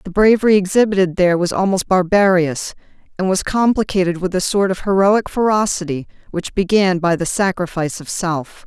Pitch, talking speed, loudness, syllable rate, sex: 185 Hz, 160 wpm, -17 LUFS, 5.5 syllables/s, female